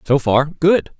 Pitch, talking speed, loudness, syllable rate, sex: 155 Hz, 180 wpm, -16 LUFS, 3.7 syllables/s, male